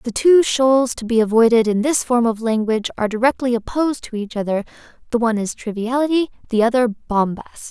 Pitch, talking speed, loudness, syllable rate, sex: 235 Hz, 185 wpm, -18 LUFS, 5.9 syllables/s, female